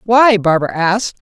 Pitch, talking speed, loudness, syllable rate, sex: 200 Hz, 135 wpm, -13 LUFS, 5.5 syllables/s, female